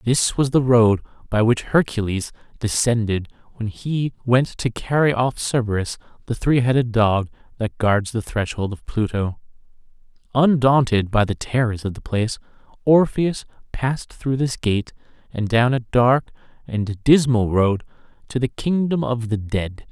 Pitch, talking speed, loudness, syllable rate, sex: 120 Hz, 150 wpm, -20 LUFS, 4.4 syllables/s, male